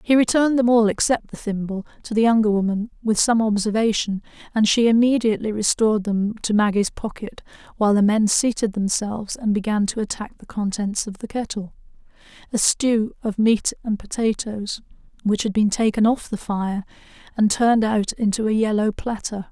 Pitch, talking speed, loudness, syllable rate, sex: 215 Hz, 165 wpm, -21 LUFS, 5.4 syllables/s, female